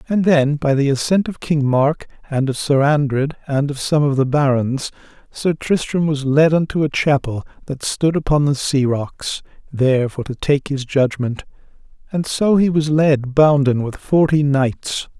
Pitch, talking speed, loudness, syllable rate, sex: 145 Hz, 180 wpm, -17 LUFS, 4.4 syllables/s, male